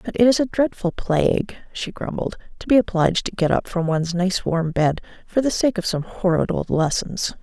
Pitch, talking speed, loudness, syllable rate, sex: 190 Hz, 220 wpm, -21 LUFS, 5.2 syllables/s, female